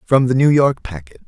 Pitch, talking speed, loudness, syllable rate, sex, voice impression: 125 Hz, 235 wpm, -14 LUFS, 5.3 syllables/s, male, masculine, very adult-like, slightly thick, cool, slightly intellectual, slightly calm